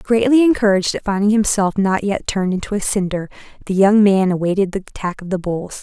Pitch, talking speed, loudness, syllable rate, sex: 195 Hz, 205 wpm, -17 LUFS, 6.0 syllables/s, female